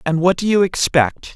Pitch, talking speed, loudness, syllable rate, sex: 170 Hz, 220 wpm, -16 LUFS, 4.9 syllables/s, male